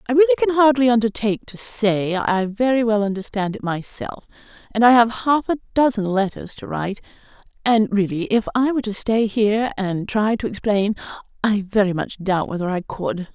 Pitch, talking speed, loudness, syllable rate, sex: 220 Hz, 185 wpm, -20 LUFS, 5.3 syllables/s, female